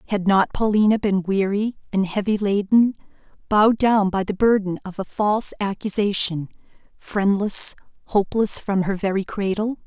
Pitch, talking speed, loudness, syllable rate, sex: 200 Hz, 140 wpm, -21 LUFS, 5.0 syllables/s, female